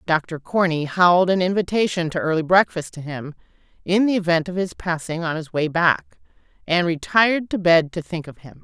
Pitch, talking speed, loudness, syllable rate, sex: 170 Hz, 195 wpm, -20 LUFS, 5.2 syllables/s, female